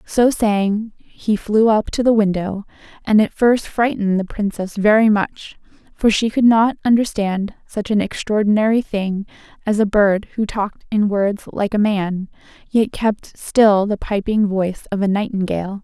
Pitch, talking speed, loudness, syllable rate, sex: 210 Hz, 165 wpm, -18 LUFS, 4.4 syllables/s, female